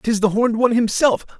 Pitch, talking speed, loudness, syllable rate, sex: 230 Hz, 215 wpm, -17 LUFS, 6.5 syllables/s, male